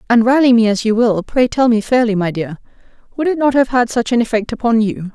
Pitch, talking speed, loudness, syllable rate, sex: 230 Hz, 255 wpm, -15 LUFS, 5.9 syllables/s, female